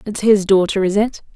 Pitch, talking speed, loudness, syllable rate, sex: 200 Hz, 220 wpm, -16 LUFS, 5.2 syllables/s, female